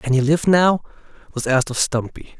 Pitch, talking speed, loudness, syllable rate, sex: 145 Hz, 200 wpm, -18 LUFS, 5.5 syllables/s, male